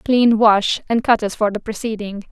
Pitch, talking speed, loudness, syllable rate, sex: 215 Hz, 210 wpm, -17 LUFS, 4.7 syllables/s, female